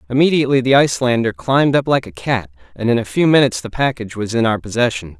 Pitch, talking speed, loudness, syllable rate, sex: 120 Hz, 220 wpm, -16 LUFS, 7.0 syllables/s, male